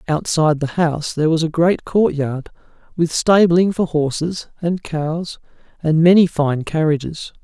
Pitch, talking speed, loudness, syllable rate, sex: 160 Hz, 145 wpm, -17 LUFS, 4.5 syllables/s, male